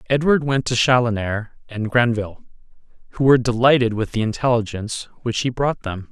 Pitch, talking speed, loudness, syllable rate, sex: 120 Hz, 155 wpm, -19 LUFS, 5.7 syllables/s, male